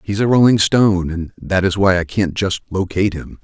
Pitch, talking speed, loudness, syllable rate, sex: 95 Hz, 225 wpm, -16 LUFS, 5.3 syllables/s, male